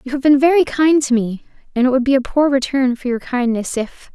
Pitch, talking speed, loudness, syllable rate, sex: 265 Hz, 260 wpm, -16 LUFS, 6.0 syllables/s, female